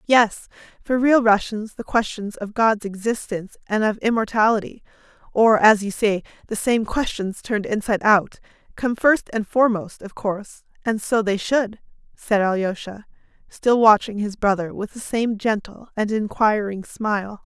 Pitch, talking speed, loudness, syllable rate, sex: 215 Hz, 155 wpm, -21 LUFS, 4.7 syllables/s, female